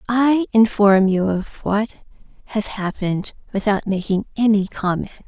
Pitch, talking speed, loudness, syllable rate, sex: 210 Hz, 125 wpm, -19 LUFS, 4.8 syllables/s, female